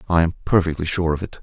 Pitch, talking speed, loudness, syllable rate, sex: 85 Hz, 250 wpm, -20 LUFS, 7.0 syllables/s, male